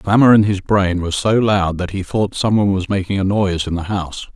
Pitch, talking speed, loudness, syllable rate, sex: 95 Hz, 275 wpm, -17 LUFS, 5.9 syllables/s, male